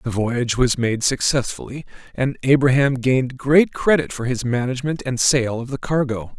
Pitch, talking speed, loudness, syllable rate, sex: 130 Hz, 170 wpm, -19 LUFS, 5.1 syllables/s, male